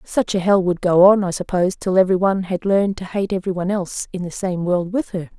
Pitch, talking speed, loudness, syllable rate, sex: 185 Hz, 265 wpm, -19 LUFS, 6.5 syllables/s, female